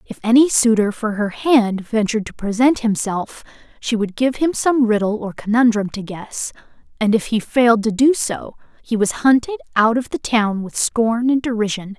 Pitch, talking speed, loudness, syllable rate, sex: 230 Hz, 190 wpm, -18 LUFS, 4.8 syllables/s, female